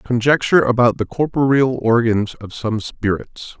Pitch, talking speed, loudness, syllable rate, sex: 120 Hz, 135 wpm, -17 LUFS, 4.6 syllables/s, male